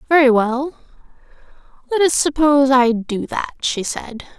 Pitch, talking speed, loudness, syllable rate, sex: 265 Hz, 135 wpm, -17 LUFS, 4.4 syllables/s, female